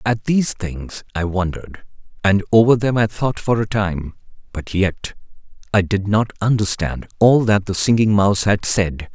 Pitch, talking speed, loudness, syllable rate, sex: 105 Hz, 170 wpm, -18 LUFS, 4.6 syllables/s, male